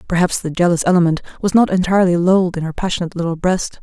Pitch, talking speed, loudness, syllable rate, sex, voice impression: 175 Hz, 205 wpm, -16 LUFS, 7.3 syllables/s, female, very feminine, very adult-like, middle-aged, relaxed, weak, slightly dark, very soft, very clear, very fluent, cute, very intellectual, refreshing, very sincere, very calm, very friendly, very reassuring, very unique, very elegant, slightly wild, very sweet, slightly lively, very kind, modest